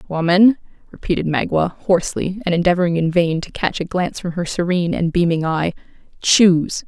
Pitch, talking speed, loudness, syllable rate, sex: 175 Hz, 165 wpm, -18 LUFS, 5.7 syllables/s, female